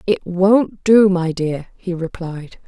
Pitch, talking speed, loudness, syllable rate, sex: 180 Hz, 155 wpm, -17 LUFS, 3.3 syllables/s, female